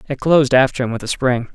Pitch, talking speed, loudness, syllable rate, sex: 130 Hz, 270 wpm, -16 LUFS, 6.7 syllables/s, male